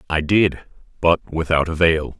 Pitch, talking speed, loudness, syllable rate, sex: 80 Hz, 135 wpm, -19 LUFS, 4.2 syllables/s, male